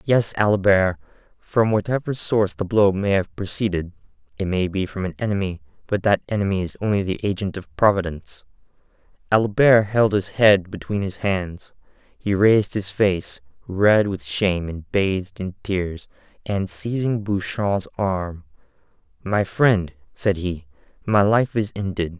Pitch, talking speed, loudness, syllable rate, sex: 95 Hz, 145 wpm, -21 LUFS, 4.4 syllables/s, male